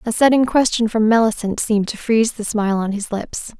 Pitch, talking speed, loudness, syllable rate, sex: 220 Hz, 215 wpm, -18 LUFS, 5.8 syllables/s, female